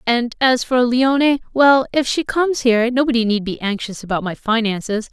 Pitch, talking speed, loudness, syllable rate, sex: 240 Hz, 175 wpm, -17 LUFS, 5.3 syllables/s, female